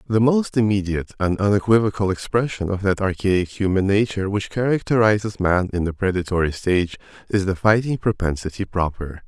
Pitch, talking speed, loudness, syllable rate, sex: 100 Hz, 150 wpm, -21 LUFS, 5.7 syllables/s, male